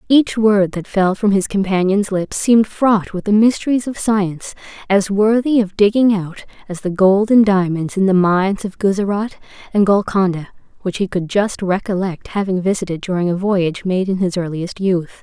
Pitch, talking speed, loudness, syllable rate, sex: 195 Hz, 185 wpm, -16 LUFS, 5.0 syllables/s, female